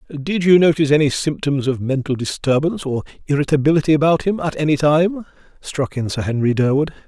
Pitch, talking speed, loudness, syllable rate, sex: 145 Hz, 170 wpm, -18 LUFS, 6.0 syllables/s, male